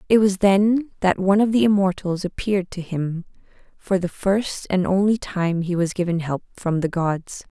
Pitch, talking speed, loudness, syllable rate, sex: 190 Hz, 190 wpm, -21 LUFS, 4.7 syllables/s, female